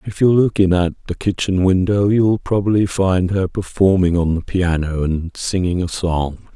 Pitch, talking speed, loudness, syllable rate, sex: 95 Hz, 185 wpm, -17 LUFS, 4.4 syllables/s, male